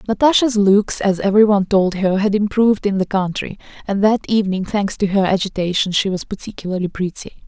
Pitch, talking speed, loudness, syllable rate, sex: 200 Hz, 175 wpm, -17 LUFS, 5.9 syllables/s, female